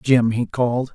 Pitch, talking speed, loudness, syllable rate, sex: 120 Hz, 190 wpm, -20 LUFS, 4.4 syllables/s, male